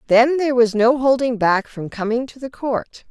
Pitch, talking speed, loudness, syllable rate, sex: 245 Hz, 215 wpm, -18 LUFS, 4.9 syllables/s, female